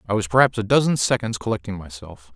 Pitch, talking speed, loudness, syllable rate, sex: 105 Hz, 205 wpm, -20 LUFS, 6.5 syllables/s, male